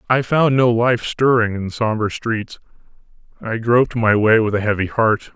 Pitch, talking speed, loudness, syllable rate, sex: 115 Hz, 190 wpm, -17 LUFS, 4.8 syllables/s, male